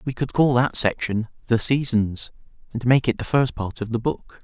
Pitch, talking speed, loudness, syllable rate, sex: 120 Hz, 215 wpm, -22 LUFS, 4.9 syllables/s, male